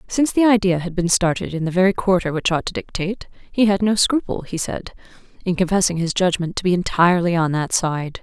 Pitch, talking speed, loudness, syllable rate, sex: 180 Hz, 220 wpm, -19 LUFS, 6.1 syllables/s, female